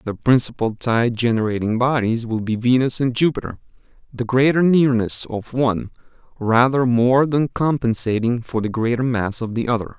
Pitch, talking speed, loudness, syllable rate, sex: 120 Hz, 155 wpm, -19 LUFS, 5.0 syllables/s, male